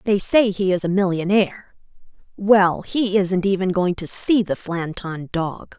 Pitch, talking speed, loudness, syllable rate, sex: 190 Hz, 165 wpm, -20 LUFS, 4.2 syllables/s, female